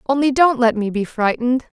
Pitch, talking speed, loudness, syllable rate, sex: 245 Hz, 200 wpm, -17 LUFS, 5.5 syllables/s, female